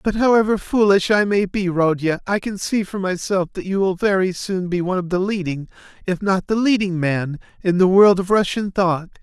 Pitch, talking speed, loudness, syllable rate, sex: 190 Hz, 200 wpm, -19 LUFS, 5.2 syllables/s, male